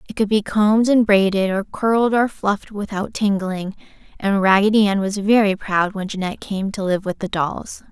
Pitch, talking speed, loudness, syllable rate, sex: 200 Hz, 195 wpm, -19 LUFS, 5.2 syllables/s, female